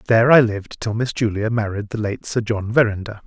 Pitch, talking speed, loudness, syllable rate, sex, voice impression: 110 Hz, 220 wpm, -19 LUFS, 5.9 syllables/s, male, masculine, adult-like, slightly relaxed, slightly bright, soft, cool, slightly mature, friendly, wild, lively, slightly strict